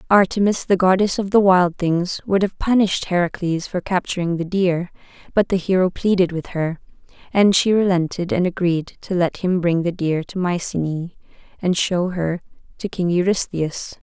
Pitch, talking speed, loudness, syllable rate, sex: 180 Hz, 170 wpm, -19 LUFS, 4.8 syllables/s, female